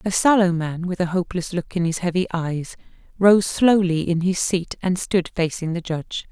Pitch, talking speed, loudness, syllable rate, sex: 175 Hz, 200 wpm, -21 LUFS, 5.0 syllables/s, female